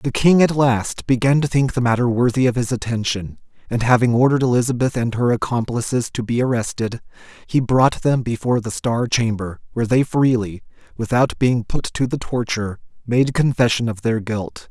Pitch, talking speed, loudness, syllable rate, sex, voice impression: 120 Hz, 180 wpm, -19 LUFS, 5.3 syllables/s, male, very masculine, very adult-like, very thick, very tensed, very powerful, bright, slightly hard, very clear, fluent, slightly raspy, cool, intellectual, very refreshing, sincere, calm, very friendly, very reassuring, slightly unique, elegant, very wild, sweet, lively, kind, slightly intense